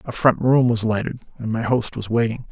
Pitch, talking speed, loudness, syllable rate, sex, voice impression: 115 Hz, 215 wpm, -20 LUFS, 5.0 syllables/s, male, masculine, middle-aged, relaxed, powerful, hard, slightly muffled, raspy, calm, mature, friendly, slightly reassuring, wild, kind, modest